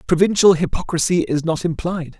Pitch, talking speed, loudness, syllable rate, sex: 165 Hz, 135 wpm, -18 LUFS, 5.4 syllables/s, male